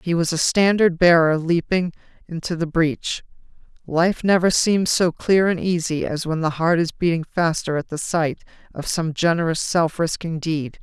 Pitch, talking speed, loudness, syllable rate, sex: 170 Hz, 175 wpm, -20 LUFS, 4.6 syllables/s, female